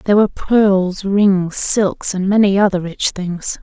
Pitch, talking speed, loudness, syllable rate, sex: 195 Hz, 165 wpm, -15 LUFS, 4.0 syllables/s, female